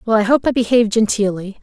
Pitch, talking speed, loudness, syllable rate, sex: 220 Hz, 220 wpm, -16 LUFS, 6.8 syllables/s, female